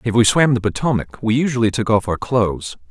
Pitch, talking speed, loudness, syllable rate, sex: 115 Hz, 225 wpm, -18 LUFS, 5.9 syllables/s, male